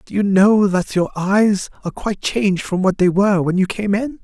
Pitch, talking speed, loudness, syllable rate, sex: 195 Hz, 240 wpm, -17 LUFS, 5.3 syllables/s, male